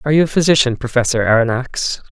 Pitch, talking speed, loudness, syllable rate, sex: 130 Hz, 170 wpm, -15 LUFS, 6.6 syllables/s, male